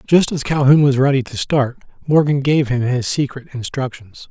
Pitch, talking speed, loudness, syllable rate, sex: 135 Hz, 180 wpm, -17 LUFS, 5.0 syllables/s, male